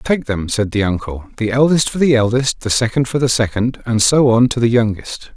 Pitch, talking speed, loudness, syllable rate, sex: 120 Hz, 235 wpm, -16 LUFS, 5.2 syllables/s, male